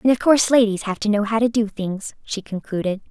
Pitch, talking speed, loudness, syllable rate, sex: 215 Hz, 250 wpm, -20 LUFS, 5.8 syllables/s, female